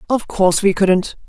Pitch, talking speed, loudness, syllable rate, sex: 195 Hz, 190 wpm, -16 LUFS, 4.9 syllables/s, male